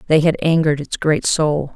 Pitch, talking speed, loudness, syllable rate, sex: 155 Hz, 205 wpm, -17 LUFS, 5.1 syllables/s, female